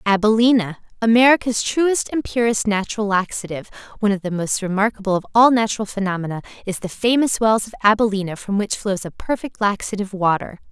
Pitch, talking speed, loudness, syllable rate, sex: 210 Hz, 160 wpm, -19 LUFS, 6.1 syllables/s, female